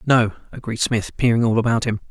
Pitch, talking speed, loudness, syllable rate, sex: 115 Hz, 200 wpm, -20 LUFS, 6.0 syllables/s, male